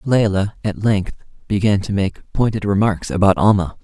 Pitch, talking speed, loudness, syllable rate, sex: 100 Hz, 155 wpm, -18 LUFS, 4.9 syllables/s, male